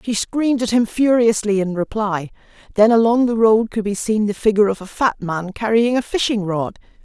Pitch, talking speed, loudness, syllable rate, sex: 215 Hz, 205 wpm, -18 LUFS, 5.4 syllables/s, female